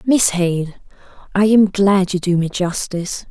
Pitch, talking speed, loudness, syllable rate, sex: 190 Hz, 165 wpm, -17 LUFS, 4.5 syllables/s, female